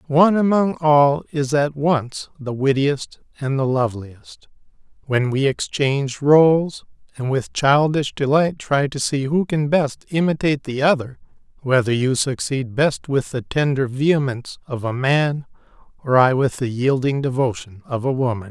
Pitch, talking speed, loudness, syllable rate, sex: 140 Hz, 155 wpm, -19 LUFS, 4.5 syllables/s, male